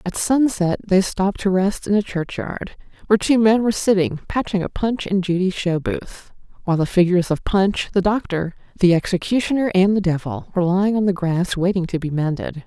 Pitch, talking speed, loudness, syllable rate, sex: 190 Hz, 200 wpm, -19 LUFS, 5.5 syllables/s, female